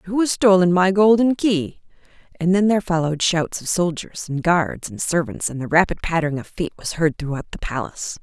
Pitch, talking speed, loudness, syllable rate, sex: 175 Hz, 205 wpm, -20 LUFS, 5.6 syllables/s, female